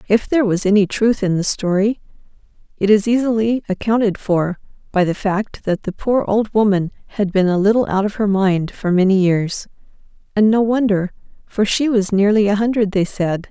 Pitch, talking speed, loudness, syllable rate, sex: 205 Hz, 185 wpm, -17 LUFS, 5.1 syllables/s, female